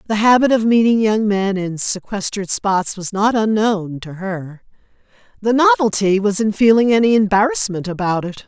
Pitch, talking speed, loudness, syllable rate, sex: 210 Hz, 165 wpm, -16 LUFS, 4.9 syllables/s, female